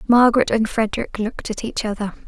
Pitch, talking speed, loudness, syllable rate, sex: 220 Hz, 185 wpm, -20 LUFS, 6.4 syllables/s, female